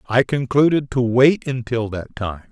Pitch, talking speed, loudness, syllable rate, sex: 125 Hz, 165 wpm, -19 LUFS, 4.2 syllables/s, male